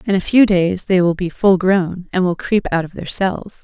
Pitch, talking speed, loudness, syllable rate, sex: 185 Hz, 265 wpm, -16 LUFS, 4.6 syllables/s, female